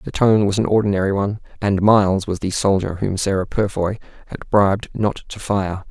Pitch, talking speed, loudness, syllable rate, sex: 100 Hz, 195 wpm, -19 LUFS, 5.6 syllables/s, male